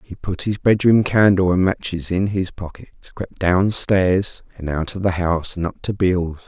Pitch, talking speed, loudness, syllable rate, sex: 95 Hz, 205 wpm, -19 LUFS, 4.6 syllables/s, male